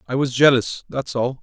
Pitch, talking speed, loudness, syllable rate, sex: 130 Hz, 210 wpm, -19 LUFS, 5.0 syllables/s, male